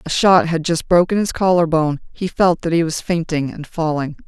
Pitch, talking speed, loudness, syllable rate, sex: 165 Hz, 225 wpm, -17 LUFS, 5.0 syllables/s, female